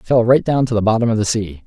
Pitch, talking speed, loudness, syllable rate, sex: 115 Hz, 360 wpm, -16 LUFS, 6.8 syllables/s, male